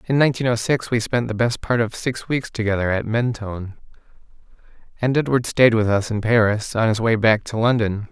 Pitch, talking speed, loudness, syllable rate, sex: 115 Hz, 205 wpm, -20 LUFS, 5.5 syllables/s, male